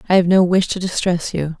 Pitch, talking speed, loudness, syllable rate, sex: 180 Hz, 265 wpm, -17 LUFS, 5.8 syllables/s, female